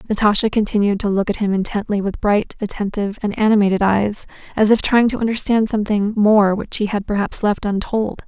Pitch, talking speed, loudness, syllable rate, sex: 210 Hz, 190 wpm, -18 LUFS, 5.7 syllables/s, female